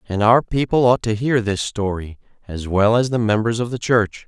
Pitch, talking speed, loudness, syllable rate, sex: 110 Hz, 225 wpm, -18 LUFS, 5.0 syllables/s, male